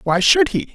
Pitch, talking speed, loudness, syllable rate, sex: 220 Hz, 240 wpm, -15 LUFS, 4.6 syllables/s, male